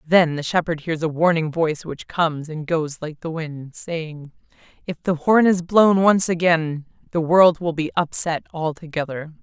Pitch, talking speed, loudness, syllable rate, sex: 160 Hz, 180 wpm, -20 LUFS, 4.4 syllables/s, female